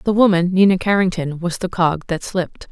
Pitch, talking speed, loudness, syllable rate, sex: 180 Hz, 200 wpm, -18 LUFS, 5.5 syllables/s, female